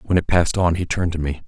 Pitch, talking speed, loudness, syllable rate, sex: 85 Hz, 325 wpm, -20 LUFS, 7.3 syllables/s, male